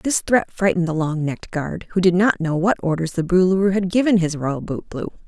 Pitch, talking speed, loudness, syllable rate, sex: 180 Hz, 225 wpm, -20 LUFS, 5.6 syllables/s, female